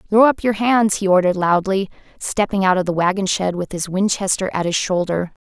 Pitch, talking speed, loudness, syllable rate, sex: 190 Hz, 210 wpm, -18 LUFS, 5.6 syllables/s, female